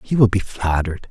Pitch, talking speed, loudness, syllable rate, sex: 100 Hz, 215 wpm, -19 LUFS, 5.9 syllables/s, male